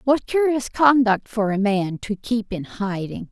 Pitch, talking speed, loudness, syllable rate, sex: 220 Hz, 165 wpm, -21 LUFS, 4.1 syllables/s, female